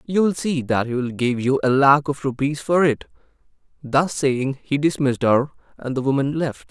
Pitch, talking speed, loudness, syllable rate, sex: 140 Hz, 205 wpm, -20 LUFS, 4.9 syllables/s, male